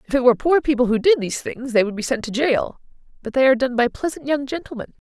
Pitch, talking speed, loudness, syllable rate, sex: 250 Hz, 270 wpm, -20 LUFS, 6.8 syllables/s, female